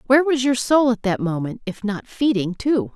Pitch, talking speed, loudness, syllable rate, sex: 230 Hz, 225 wpm, -20 LUFS, 5.1 syllables/s, female